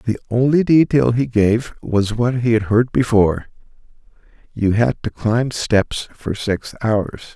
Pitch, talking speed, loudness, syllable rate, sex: 115 Hz, 155 wpm, -18 LUFS, 4.2 syllables/s, male